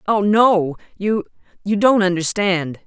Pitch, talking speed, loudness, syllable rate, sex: 195 Hz, 85 wpm, -17 LUFS, 3.8 syllables/s, female